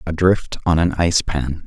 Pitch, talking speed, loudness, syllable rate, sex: 85 Hz, 180 wpm, -18 LUFS, 4.9 syllables/s, male